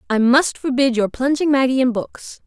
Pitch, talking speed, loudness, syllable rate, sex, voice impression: 255 Hz, 195 wpm, -17 LUFS, 4.9 syllables/s, female, feminine, adult-like, slightly cool, intellectual, slightly unique